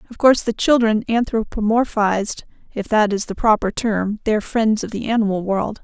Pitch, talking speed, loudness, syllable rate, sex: 215 Hz, 155 wpm, -19 LUFS, 5.1 syllables/s, female